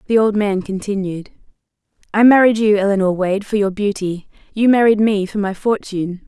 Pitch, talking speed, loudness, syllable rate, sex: 205 Hz, 170 wpm, -16 LUFS, 5.4 syllables/s, female